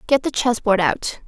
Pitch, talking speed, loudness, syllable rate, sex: 235 Hz, 190 wpm, -19 LUFS, 4.6 syllables/s, female